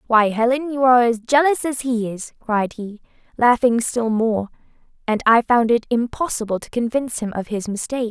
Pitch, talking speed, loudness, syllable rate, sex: 235 Hz, 185 wpm, -19 LUFS, 5.3 syllables/s, female